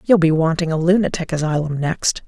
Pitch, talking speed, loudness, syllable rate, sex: 165 Hz, 185 wpm, -18 LUFS, 5.5 syllables/s, female